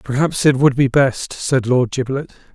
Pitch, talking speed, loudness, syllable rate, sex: 130 Hz, 190 wpm, -17 LUFS, 4.4 syllables/s, male